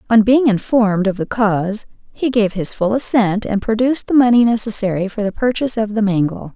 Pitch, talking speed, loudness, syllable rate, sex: 215 Hz, 200 wpm, -16 LUFS, 5.7 syllables/s, female